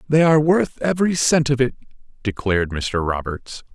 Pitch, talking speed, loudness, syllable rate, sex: 130 Hz, 160 wpm, -19 LUFS, 5.3 syllables/s, male